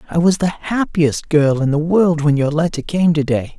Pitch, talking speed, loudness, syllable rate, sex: 160 Hz, 220 wpm, -16 LUFS, 4.8 syllables/s, male